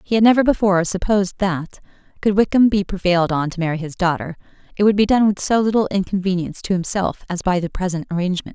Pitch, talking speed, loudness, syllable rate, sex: 190 Hz, 210 wpm, -19 LUFS, 6.6 syllables/s, female